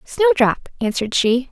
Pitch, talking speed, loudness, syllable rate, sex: 235 Hz, 120 wpm, -18 LUFS, 4.7 syllables/s, female